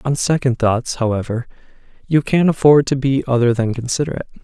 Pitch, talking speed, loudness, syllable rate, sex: 130 Hz, 160 wpm, -17 LUFS, 5.9 syllables/s, male